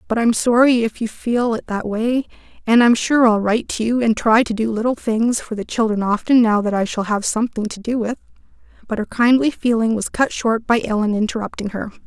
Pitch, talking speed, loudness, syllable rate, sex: 225 Hz, 230 wpm, -18 LUFS, 5.5 syllables/s, female